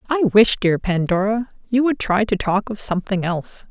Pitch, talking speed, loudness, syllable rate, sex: 205 Hz, 195 wpm, -19 LUFS, 4.9 syllables/s, female